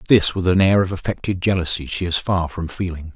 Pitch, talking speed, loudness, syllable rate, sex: 90 Hz, 230 wpm, -20 LUFS, 5.8 syllables/s, male